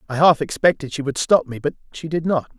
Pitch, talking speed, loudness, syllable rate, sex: 150 Hz, 255 wpm, -20 LUFS, 6.0 syllables/s, male